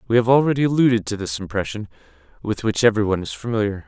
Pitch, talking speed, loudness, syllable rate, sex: 110 Hz, 185 wpm, -20 LUFS, 7.3 syllables/s, male